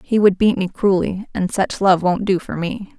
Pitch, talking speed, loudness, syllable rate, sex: 190 Hz, 240 wpm, -18 LUFS, 4.6 syllables/s, female